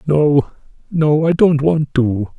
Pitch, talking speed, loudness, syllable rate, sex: 150 Hz, 150 wpm, -15 LUFS, 3.2 syllables/s, male